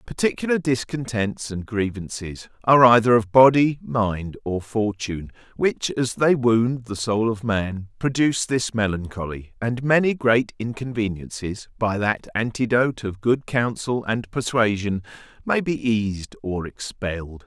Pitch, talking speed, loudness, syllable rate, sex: 115 Hz, 135 wpm, -22 LUFS, 4.3 syllables/s, male